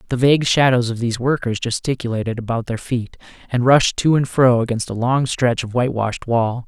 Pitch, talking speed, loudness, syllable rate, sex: 120 Hz, 205 wpm, -18 LUFS, 5.5 syllables/s, male